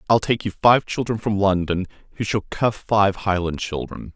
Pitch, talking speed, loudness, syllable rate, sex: 100 Hz, 190 wpm, -21 LUFS, 4.7 syllables/s, male